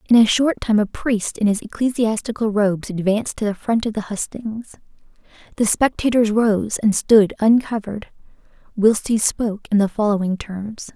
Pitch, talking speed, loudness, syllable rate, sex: 215 Hz, 165 wpm, -19 LUFS, 5.0 syllables/s, female